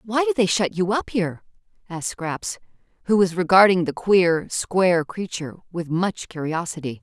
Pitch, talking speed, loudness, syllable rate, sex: 185 Hz, 160 wpm, -21 LUFS, 4.9 syllables/s, female